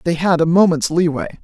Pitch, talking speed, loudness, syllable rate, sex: 170 Hz, 210 wpm, -15 LUFS, 6.0 syllables/s, female